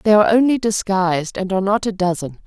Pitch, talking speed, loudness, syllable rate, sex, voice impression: 200 Hz, 220 wpm, -18 LUFS, 6.6 syllables/s, female, very feminine, slightly adult-like, thin, slightly tensed, slightly powerful, bright, slightly hard, clear, fluent, cute, slightly cool, intellectual, refreshing, very sincere, very calm, very friendly, reassuring, slightly unique, elegant, slightly sweet, slightly lively, kind, slightly modest, slightly light